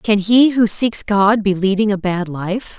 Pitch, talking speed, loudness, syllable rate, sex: 205 Hz, 215 wpm, -16 LUFS, 4.0 syllables/s, female